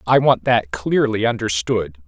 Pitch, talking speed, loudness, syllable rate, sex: 105 Hz, 145 wpm, -18 LUFS, 4.3 syllables/s, male